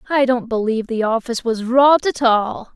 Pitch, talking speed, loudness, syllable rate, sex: 240 Hz, 195 wpm, -17 LUFS, 5.5 syllables/s, female